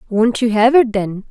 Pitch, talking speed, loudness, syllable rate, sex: 225 Hz, 230 wpm, -14 LUFS, 4.6 syllables/s, female